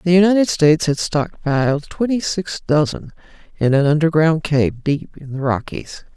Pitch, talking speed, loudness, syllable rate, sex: 155 Hz, 155 wpm, -17 LUFS, 4.7 syllables/s, female